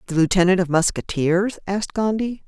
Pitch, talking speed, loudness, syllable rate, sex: 190 Hz, 145 wpm, -20 LUFS, 5.5 syllables/s, female